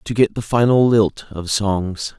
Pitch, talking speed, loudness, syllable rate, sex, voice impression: 105 Hz, 190 wpm, -17 LUFS, 4.0 syllables/s, male, masculine, adult-like, slightly thick, slightly dark, cool, slightly calm